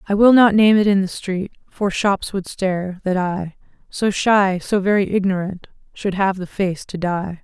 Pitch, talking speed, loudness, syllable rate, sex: 195 Hz, 200 wpm, -18 LUFS, 4.5 syllables/s, female